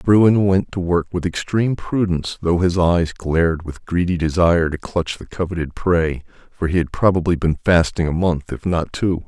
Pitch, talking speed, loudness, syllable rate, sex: 85 Hz, 195 wpm, -19 LUFS, 4.9 syllables/s, male